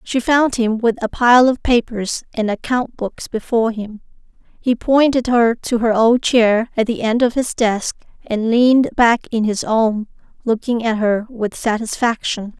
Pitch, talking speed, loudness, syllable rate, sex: 230 Hz, 170 wpm, -17 LUFS, 4.3 syllables/s, female